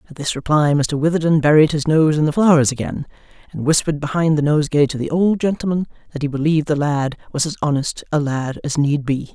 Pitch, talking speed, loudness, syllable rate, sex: 150 Hz, 220 wpm, -18 LUFS, 6.2 syllables/s, female